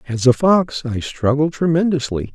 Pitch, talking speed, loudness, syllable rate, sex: 140 Hz, 155 wpm, -18 LUFS, 4.7 syllables/s, male